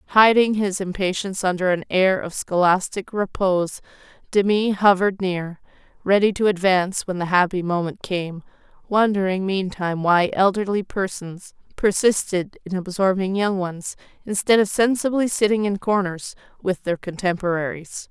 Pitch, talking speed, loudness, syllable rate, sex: 190 Hz, 130 wpm, -21 LUFS, 4.8 syllables/s, female